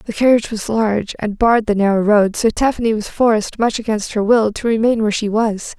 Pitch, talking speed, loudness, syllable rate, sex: 220 Hz, 230 wpm, -16 LUFS, 5.9 syllables/s, female